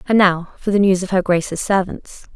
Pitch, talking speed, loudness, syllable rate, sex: 190 Hz, 230 wpm, -17 LUFS, 5.3 syllables/s, female